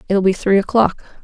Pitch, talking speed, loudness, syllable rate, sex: 200 Hz, 195 wpm, -16 LUFS, 5.8 syllables/s, female